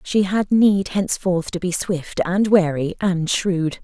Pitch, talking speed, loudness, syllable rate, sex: 185 Hz, 170 wpm, -19 LUFS, 3.9 syllables/s, female